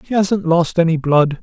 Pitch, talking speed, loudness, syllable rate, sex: 170 Hz, 210 wpm, -16 LUFS, 4.6 syllables/s, male